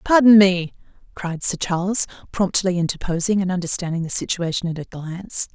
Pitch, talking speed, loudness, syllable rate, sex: 180 Hz, 150 wpm, -20 LUFS, 5.5 syllables/s, female